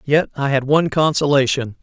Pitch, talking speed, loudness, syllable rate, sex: 140 Hz, 165 wpm, -17 LUFS, 5.6 syllables/s, male